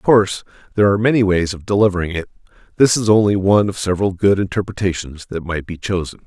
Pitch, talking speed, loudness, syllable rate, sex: 95 Hz, 200 wpm, -17 LUFS, 6.9 syllables/s, male